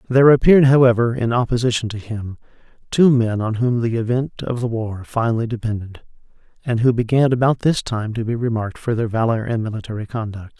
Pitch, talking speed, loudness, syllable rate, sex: 115 Hz, 185 wpm, -19 LUFS, 6.0 syllables/s, male